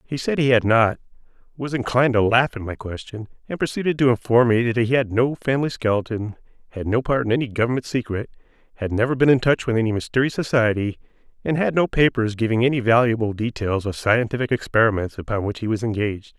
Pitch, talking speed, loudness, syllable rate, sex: 115 Hz, 200 wpm, -21 LUFS, 6.3 syllables/s, male